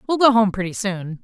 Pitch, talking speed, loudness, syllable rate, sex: 205 Hz, 245 wpm, -19 LUFS, 5.6 syllables/s, female